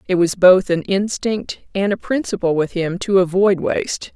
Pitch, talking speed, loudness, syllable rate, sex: 190 Hz, 190 wpm, -18 LUFS, 4.6 syllables/s, female